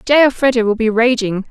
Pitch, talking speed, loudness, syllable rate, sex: 235 Hz, 200 wpm, -14 LUFS, 5.7 syllables/s, female